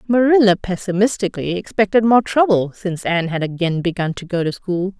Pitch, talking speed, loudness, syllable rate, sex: 190 Hz, 170 wpm, -18 LUFS, 5.9 syllables/s, female